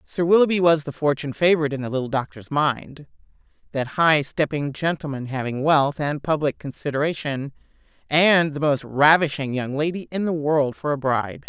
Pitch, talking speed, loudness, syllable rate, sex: 145 Hz, 165 wpm, -21 LUFS, 5.2 syllables/s, female